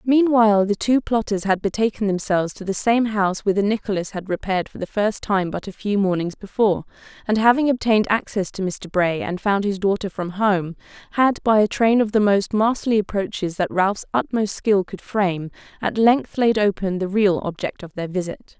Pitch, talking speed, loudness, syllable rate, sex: 200 Hz, 200 wpm, -21 LUFS, 5.4 syllables/s, female